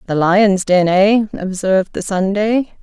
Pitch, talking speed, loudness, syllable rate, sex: 195 Hz, 150 wpm, -15 LUFS, 4.0 syllables/s, female